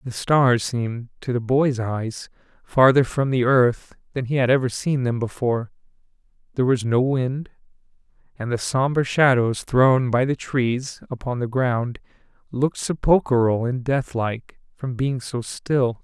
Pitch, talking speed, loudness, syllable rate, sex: 125 Hz, 155 wpm, -21 LUFS, 4.2 syllables/s, male